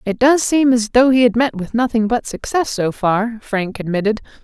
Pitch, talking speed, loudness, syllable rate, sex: 230 Hz, 215 wpm, -16 LUFS, 4.9 syllables/s, female